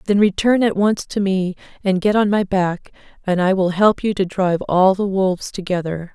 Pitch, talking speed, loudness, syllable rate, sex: 190 Hz, 215 wpm, -18 LUFS, 5.0 syllables/s, female